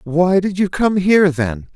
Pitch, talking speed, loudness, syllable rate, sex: 170 Hz, 205 wpm, -16 LUFS, 4.3 syllables/s, male